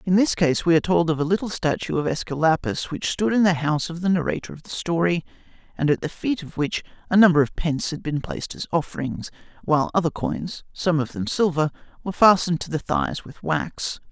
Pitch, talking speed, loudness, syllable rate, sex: 165 Hz, 220 wpm, -22 LUFS, 5.9 syllables/s, male